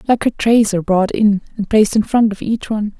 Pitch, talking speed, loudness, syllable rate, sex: 215 Hz, 240 wpm, -15 LUFS, 6.4 syllables/s, female